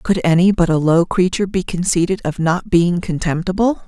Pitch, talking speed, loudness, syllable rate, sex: 180 Hz, 185 wpm, -16 LUFS, 5.3 syllables/s, female